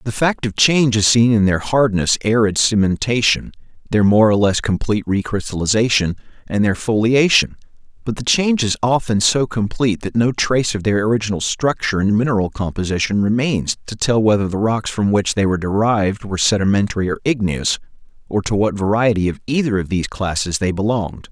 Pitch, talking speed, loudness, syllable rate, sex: 105 Hz, 175 wpm, -17 LUFS, 5.8 syllables/s, male